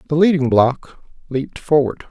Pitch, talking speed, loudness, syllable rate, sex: 140 Hz, 145 wpm, -17 LUFS, 4.9 syllables/s, male